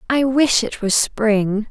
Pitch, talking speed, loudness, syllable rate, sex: 230 Hz, 175 wpm, -17 LUFS, 4.0 syllables/s, female